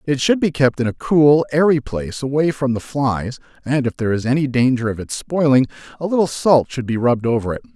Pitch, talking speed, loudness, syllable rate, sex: 135 Hz, 230 wpm, -18 LUFS, 5.9 syllables/s, male